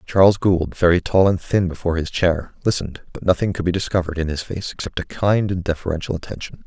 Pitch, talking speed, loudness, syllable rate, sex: 90 Hz, 215 wpm, -20 LUFS, 6.3 syllables/s, male